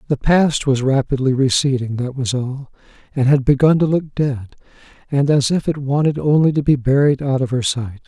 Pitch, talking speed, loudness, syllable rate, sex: 135 Hz, 200 wpm, -17 LUFS, 5.2 syllables/s, male